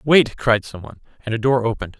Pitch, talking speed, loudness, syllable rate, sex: 115 Hz, 210 wpm, -19 LUFS, 6.3 syllables/s, male